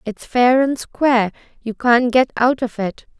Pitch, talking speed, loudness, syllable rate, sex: 240 Hz, 190 wpm, -17 LUFS, 4.2 syllables/s, female